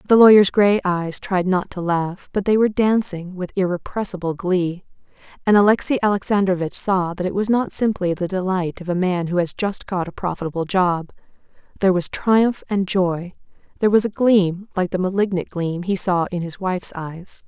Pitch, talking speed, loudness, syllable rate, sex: 185 Hz, 190 wpm, -20 LUFS, 5.1 syllables/s, female